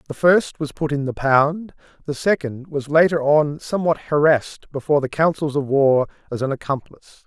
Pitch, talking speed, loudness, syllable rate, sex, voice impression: 145 Hz, 180 wpm, -19 LUFS, 5.2 syllables/s, male, masculine, adult-like, powerful, bright, clear, slightly raspy, intellectual, calm, friendly, reassuring, wild, lively, kind, light